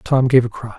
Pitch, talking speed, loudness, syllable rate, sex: 120 Hz, 305 wpm, -15 LUFS, 6.1 syllables/s, male